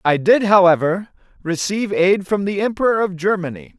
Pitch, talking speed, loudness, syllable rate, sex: 190 Hz, 160 wpm, -17 LUFS, 5.3 syllables/s, male